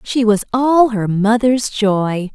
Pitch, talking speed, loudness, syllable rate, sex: 220 Hz, 155 wpm, -15 LUFS, 3.2 syllables/s, female